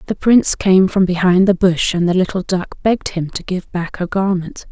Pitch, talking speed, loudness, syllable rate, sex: 185 Hz, 230 wpm, -16 LUFS, 5.1 syllables/s, female